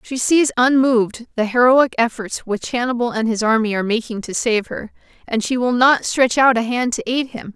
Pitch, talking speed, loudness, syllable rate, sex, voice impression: 240 Hz, 215 wpm, -17 LUFS, 5.2 syllables/s, female, feminine, very adult-like, clear, intellectual, slightly sharp